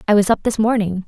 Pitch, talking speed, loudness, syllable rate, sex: 210 Hz, 280 wpm, -17 LUFS, 7.1 syllables/s, female